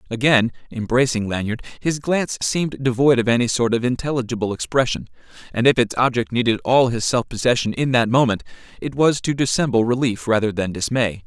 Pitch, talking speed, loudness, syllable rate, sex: 125 Hz, 175 wpm, -19 LUFS, 5.8 syllables/s, male